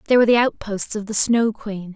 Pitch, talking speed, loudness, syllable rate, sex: 215 Hz, 245 wpm, -19 LUFS, 5.7 syllables/s, female